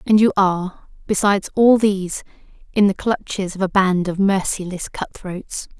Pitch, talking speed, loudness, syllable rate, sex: 195 Hz, 155 wpm, -19 LUFS, 4.8 syllables/s, female